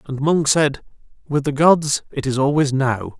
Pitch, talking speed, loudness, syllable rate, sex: 140 Hz, 190 wpm, -18 LUFS, 4.2 syllables/s, male